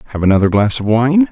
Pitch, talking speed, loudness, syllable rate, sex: 120 Hz, 230 wpm, -13 LUFS, 6.8 syllables/s, male